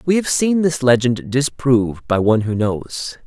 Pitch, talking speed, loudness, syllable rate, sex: 130 Hz, 185 wpm, -17 LUFS, 4.6 syllables/s, male